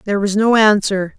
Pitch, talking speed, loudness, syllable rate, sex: 205 Hz, 205 wpm, -14 LUFS, 5.7 syllables/s, female